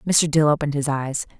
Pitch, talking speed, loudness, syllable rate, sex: 150 Hz, 215 wpm, -20 LUFS, 6.0 syllables/s, female